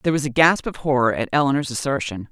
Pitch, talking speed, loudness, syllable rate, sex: 140 Hz, 235 wpm, -20 LUFS, 6.9 syllables/s, female